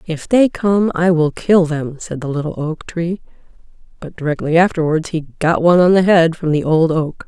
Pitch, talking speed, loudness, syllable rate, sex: 165 Hz, 205 wpm, -16 LUFS, 4.9 syllables/s, female